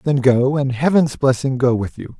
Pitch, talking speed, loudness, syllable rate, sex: 135 Hz, 220 wpm, -17 LUFS, 4.8 syllables/s, male